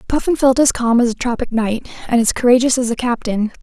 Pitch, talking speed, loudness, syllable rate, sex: 245 Hz, 230 wpm, -16 LUFS, 6.0 syllables/s, female